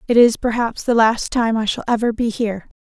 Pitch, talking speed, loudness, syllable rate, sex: 225 Hz, 235 wpm, -18 LUFS, 5.6 syllables/s, female